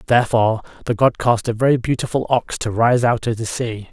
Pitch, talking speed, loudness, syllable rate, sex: 115 Hz, 215 wpm, -18 LUFS, 6.0 syllables/s, male